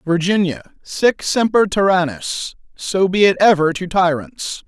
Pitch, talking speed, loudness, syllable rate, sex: 185 Hz, 115 wpm, -17 LUFS, 4.0 syllables/s, male